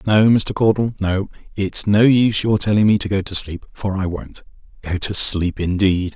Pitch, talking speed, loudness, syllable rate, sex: 100 Hz, 205 wpm, -18 LUFS, 4.8 syllables/s, male